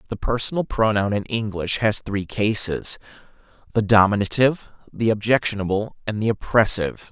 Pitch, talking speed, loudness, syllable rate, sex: 105 Hz, 125 wpm, -21 LUFS, 5.4 syllables/s, male